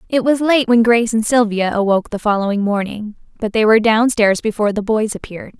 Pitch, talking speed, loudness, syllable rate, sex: 220 Hz, 215 wpm, -15 LUFS, 6.2 syllables/s, female